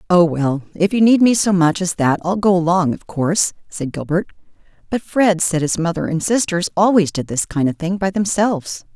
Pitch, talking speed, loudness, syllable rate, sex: 180 Hz, 215 wpm, -17 LUFS, 5.2 syllables/s, female